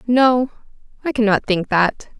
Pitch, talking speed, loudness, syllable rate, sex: 225 Hz, 135 wpm, -18 LUFS, 4.0 syllables/s, female